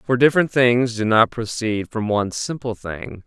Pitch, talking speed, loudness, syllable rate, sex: 115 Hz, 185 wpm, -20 LUFS, 4.8 syllables/s, male